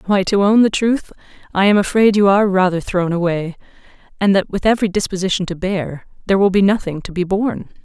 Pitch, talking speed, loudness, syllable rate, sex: 195 Hz, 205 wpm, -16 LUFS, 6.1 syllables/s, female